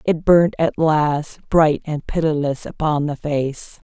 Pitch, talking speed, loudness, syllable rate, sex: 150 Hz, 155 wpm, -19 LUFS, 3.7 syllables/s, female